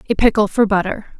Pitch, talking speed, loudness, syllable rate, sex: 210 Hz, 200 wpm, -16 LUFS, 6.2 syllables/s, female